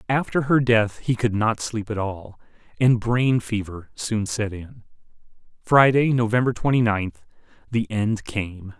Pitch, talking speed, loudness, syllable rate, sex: 110 Hz, 150 wpm, -22 LUFS, 4.0 syllables/s, male